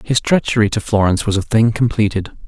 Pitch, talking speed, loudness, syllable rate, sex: 110 Hz, 195 wpm, -16 LUFS, 6.3 syllables/s, male